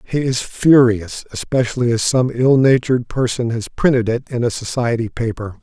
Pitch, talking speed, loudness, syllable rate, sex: 120 Hz, 170 wpm, -17 LUFS, 5.0 syllables/s, male